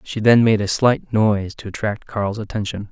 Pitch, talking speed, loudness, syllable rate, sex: 110 Hz, 205 wpm, -19 LUFS, 5.0 syllables/s, male